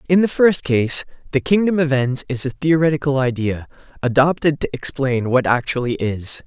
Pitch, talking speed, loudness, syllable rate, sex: 140 Hz, 165 wpm, -18 LUFS, 5.0 syllables/s, male